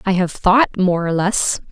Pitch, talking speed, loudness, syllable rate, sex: 190 Hz, 210 wpm, -16 LUFS, 4.2 syllables/s, female